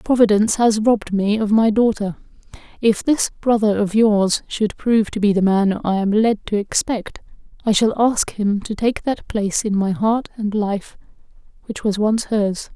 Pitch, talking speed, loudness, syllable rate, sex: 210 Hz, 190 wpm, -18 LUFS, 4.6 syllables/s, female